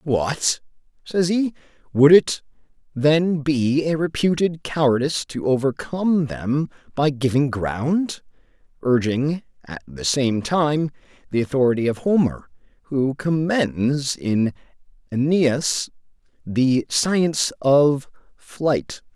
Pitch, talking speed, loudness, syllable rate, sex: 140 Hz, 105 wpm, -21 LUFS, 3.5 syllables/s, male